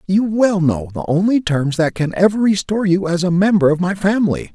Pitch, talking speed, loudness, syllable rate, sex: 185 Hz, 225 wpm, -16 LUFS, 5.5 syllables/s, male